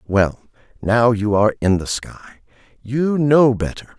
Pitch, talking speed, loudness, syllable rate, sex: 115 Hz, 150 wpm, -18 LUFS, 4.6 syllables/s, male